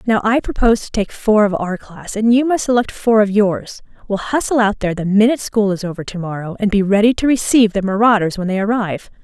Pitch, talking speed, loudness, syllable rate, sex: 210 Hz, 240 wpm, -16 LUFS, 6.1 syllables/s, female